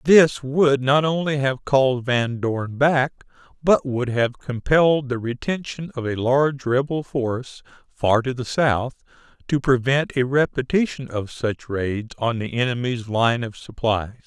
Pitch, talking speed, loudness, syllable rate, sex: 130 Hz, 155 wpm, -21 LUFS, 4.2 syllables/s, male